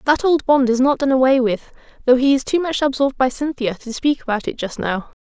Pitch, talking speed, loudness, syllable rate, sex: 260 Hz, 250 wpm, -18 LUFS, 5.8 syllables/s, female